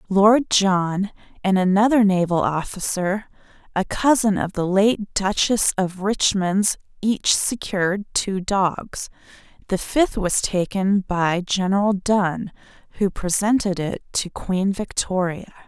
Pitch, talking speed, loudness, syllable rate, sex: 195 Hz, 120 wpm, -21 LUFS, 3.7 syllables/s, female